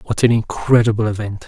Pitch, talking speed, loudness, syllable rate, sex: 110 Hz, 165 wpm, -17 LUFS, 5.6 syllables/s, male